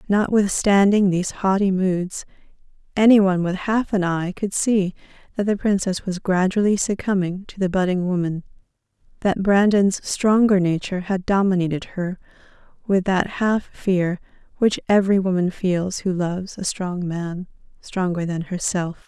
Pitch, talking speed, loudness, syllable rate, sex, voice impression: 190 Hz, 135 wpm, -21 LUFS, 4.7 syllables/s, female, feminine, adult-like, slightly weak, soft, slightly muffled, fluent, calm, reassuring, elegant, kind, modest